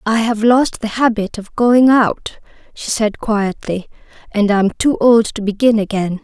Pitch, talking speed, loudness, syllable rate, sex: 220 Hz, 175 wpm, -15 LUFS, 4.1 syllables/s, female